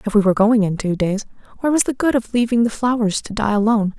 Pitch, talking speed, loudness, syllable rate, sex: 220 Hz, 270 wpm, -18 LUFS, 6.8 syllables/s, female